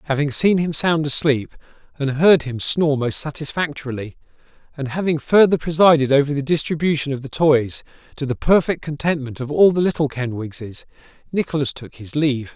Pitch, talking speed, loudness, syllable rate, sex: 145 Hz, 160 wpm, -19 LUFS, 5.5 syllables/s, male